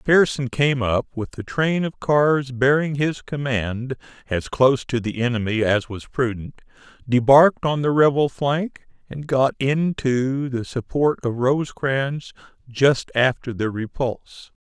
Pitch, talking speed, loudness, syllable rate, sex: 130 Hz, 150 wpm, -21 LUFS, 4.2 syllables/s, male